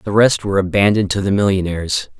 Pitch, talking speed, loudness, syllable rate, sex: 100 Hz, 190 wpm, -16 LUFS, 6.7 syllables/s, male